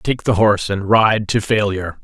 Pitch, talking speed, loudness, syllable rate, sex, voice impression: 105 Hz, 205 wpm, -16 LUFS, 5.1 syllables/s, male, masculine, adult-like, middle-aged, thick, powerful, clear, raspy, intellectual, slightly sincere, mature, wild, lively, slightly strict